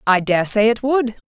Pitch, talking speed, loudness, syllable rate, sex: 220 Hz, 235 wpm, -17 LUFS, 4.7 syllables/s, female